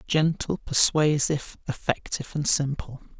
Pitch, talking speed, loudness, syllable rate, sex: 145 Hz, 95 wpm, -24 LUFS, 4.6 syllables/s, male